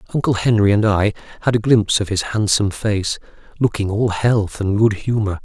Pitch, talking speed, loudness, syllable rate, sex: 105 Hz, 190 wpm, -18 LUFS, 5.5 syllables/s, male